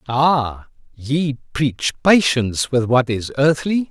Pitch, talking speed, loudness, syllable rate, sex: 135 Hz, 125 wpm, -18 LUFS, 3.4 syllables/s, male